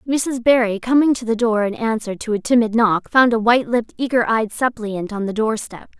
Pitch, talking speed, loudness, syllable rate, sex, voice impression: 225 Hz, 220 wpm, -18 LUFS, 5.5 syllables/s, female, very feminine, very young, very thin, tensed, slightly powerful, very bright, very hard, very clear, very fluent, very cute, intellectual, refreshing, sincere, slightly calm, friendly, reassuring, unique, slightly elegant, slightly wild, sweet, very lively, strict, intense, slightly sharp, slightly light